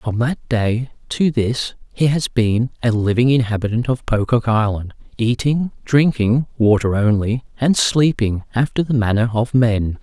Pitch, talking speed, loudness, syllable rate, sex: 120 Hz, 150 wpm, -18 LUFS, 4.2 syllables/s, male